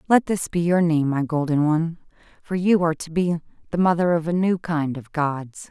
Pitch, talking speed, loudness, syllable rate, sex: 165 Hz, 220 wpm, -22 LUFS, 5.3 syllables/s, female